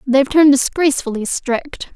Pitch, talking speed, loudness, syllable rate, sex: 270 Hz, 125 wpm, -15 LUFS, 5.6 syllables/s, female